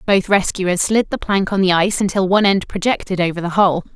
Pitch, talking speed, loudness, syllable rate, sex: 190 Hz, 230 wpm, -17 LUFS, 5.9 syllables/s, female